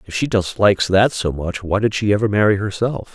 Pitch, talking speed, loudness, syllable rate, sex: 100 Hz, 230 wpm, -18 LUFS, 5.7 syllables/s, male